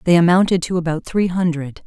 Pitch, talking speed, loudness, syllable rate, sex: 170 Hz, 195 wpm, -18 LUFS, 5.7 syllables/s, female